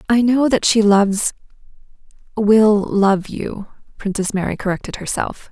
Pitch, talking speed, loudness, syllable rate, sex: 210 Hz, 130 wpm, -17 LUFS, 4.5 syllables/s, female